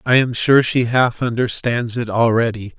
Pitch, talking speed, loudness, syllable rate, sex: 120 Hz, 175 wpm, -17 LUFS, 4.5 syllables/s, male